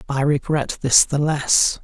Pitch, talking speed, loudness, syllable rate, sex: 140 Hz, 165 wpm, -18 LUFS, 3.7 syllables/s, male